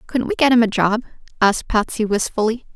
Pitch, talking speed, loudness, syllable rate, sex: 220 Hz, 195 wpm, -18 LUFS, 5.9 syllables/s, female